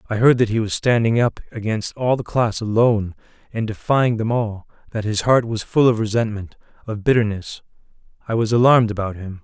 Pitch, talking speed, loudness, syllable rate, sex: 110 Hz, 185 wpm, -19 LUFS, 5.5 syllables/s, male